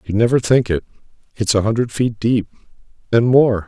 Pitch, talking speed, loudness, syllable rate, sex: 110 Hz, 145 wpm, -17 LUFS, 5.5 syllables/s, male